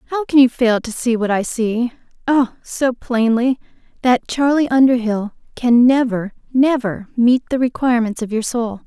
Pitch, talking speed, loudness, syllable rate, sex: 245 Hz, 160 wpm, -17 LUFS, 4.6 syllables/s, female